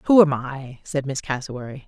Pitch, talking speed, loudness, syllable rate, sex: 140 Hz, 190 wpm, -23 LUFS, 5.4 syllables/s, female